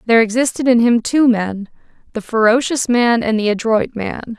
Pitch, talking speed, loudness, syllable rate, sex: 230 Hz, 180 wpm, -15 LUFS, 5.0 syllables/s, female